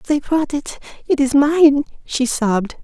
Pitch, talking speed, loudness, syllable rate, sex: 280 Hz, 170 wpm, -17 LUFS, 4.3 syllables/s, female